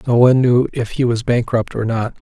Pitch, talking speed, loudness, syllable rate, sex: 120 Hz, 235 wpm, -16 LUFS, 5.5 syllables/s, male